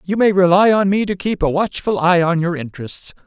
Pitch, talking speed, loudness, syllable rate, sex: 180 Hz, 240 wpm, -16 LUFS, 5.3 syllables/s, male